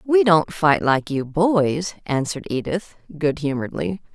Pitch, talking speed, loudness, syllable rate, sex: 165 Hz, 145 wpm, -21 LUFS, 4.5 syllables/s, female